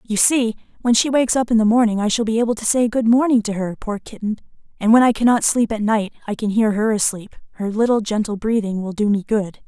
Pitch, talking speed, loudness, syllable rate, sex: 220 Hz, 255 wpm, -18 LUFS, 6.0 syllables/s, female